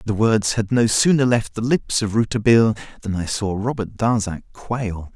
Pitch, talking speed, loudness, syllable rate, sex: 110 Hz, 185 wpm, -20 LUFS, 4.9 syllables/s, male